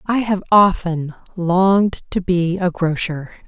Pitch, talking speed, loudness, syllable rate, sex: 180 Hz, 140 wpm, -17 LUFS, 3.7 syllables/s, female